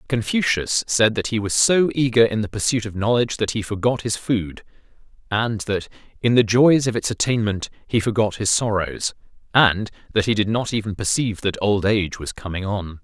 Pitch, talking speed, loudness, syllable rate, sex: 110 Hz, 195 wpm, -20 LUFS, 5.3 syllables/s, male